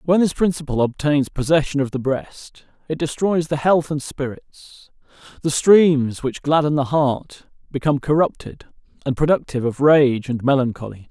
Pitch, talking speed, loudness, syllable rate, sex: 145 Hz, 150 wpm, -19 LUFS, 4.7 syllables/s, male